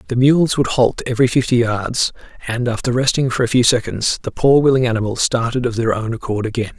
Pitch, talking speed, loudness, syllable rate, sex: 120 Hz, 210 wpm, -17 LUFS, 5.8 syllables/s, male